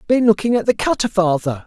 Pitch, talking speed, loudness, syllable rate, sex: 205 Hz, 215 wpm, -17 LUFS, 6.0 syllables/s, male